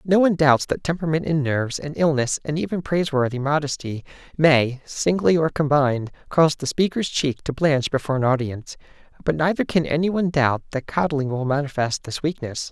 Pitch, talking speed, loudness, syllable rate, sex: 145 Hz, 180 wpm, -21 LUFS, 5.9 syllables/s, male